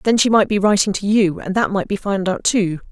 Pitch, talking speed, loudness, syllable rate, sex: 200 Hz, 290 wpm, -17 LUFS, 5.5 syllables/s, female